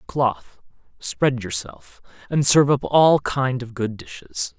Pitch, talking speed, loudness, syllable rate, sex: 115 Hz, 145 wpm, -20 LUFS, 3.7 syllables/s, male